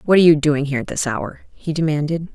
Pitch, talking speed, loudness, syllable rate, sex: 150 Hz, 255 wpm, -18 LUFS, 6.7 syllables/s, female